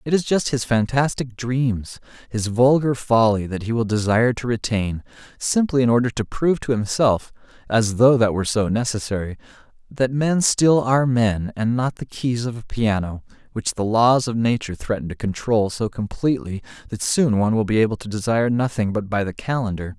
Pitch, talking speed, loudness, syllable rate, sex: 115 Hz, 185 wpm, -20 LUFS, 5.3 syllables/s, male